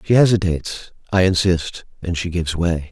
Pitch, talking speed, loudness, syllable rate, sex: 90 Hz, 165 wpm, -19 LUFS, 5.8 syllables/s, male